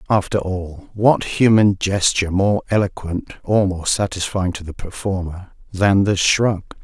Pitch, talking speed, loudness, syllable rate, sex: 95 Hz, 140 wpm, -18 LUFS, 3.1 syllables/s, male